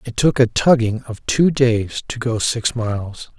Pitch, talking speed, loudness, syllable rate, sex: 115 Hz, 195 wpm, -18 LUFS, 4.1 syllables/s, male